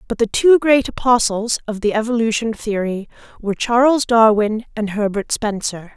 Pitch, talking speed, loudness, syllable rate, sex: 225 Hz, 150 wpm, -17 LUFS, 4.9 syllables/s, female